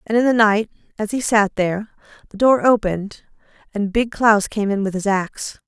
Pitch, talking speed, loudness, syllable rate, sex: 210 Hz, 200 wpm, -18 LUFS, 5.3 syllables/s, female